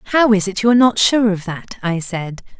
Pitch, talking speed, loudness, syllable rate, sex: 200 Hz, 255 wpm, -16 LUFS, 5.6 syllables/s, female